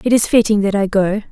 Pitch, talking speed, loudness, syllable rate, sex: 205 Hz, 275 wpm, -15 LUFS, 6.1 syllables/s, female